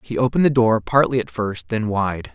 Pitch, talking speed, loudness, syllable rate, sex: 110 Hz, 230 wpm, -19 LUFS, 5.3 syllables/s, male